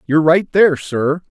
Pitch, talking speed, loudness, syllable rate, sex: 160 Hz, 175 wpm, -15 LUFS, 5.2 syllables/s, male